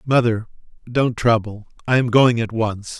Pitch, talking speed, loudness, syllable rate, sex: 115 Hz, 160 wpm, -19 LUFS, 4.3 syllables/s, male